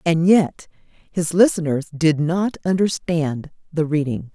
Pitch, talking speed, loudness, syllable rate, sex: 165 Hz, 125 wpm, -20 LUFS, 4.0 syllables/s, female